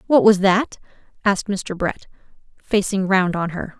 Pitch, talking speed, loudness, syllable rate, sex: 195 Hz, 160 wpm, -19 LUFS, 4.4 syllables/s, female